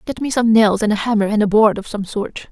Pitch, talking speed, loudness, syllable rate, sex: 215 Hz, 310 wpm, -16 LUFS, 5.9 syllables/s, female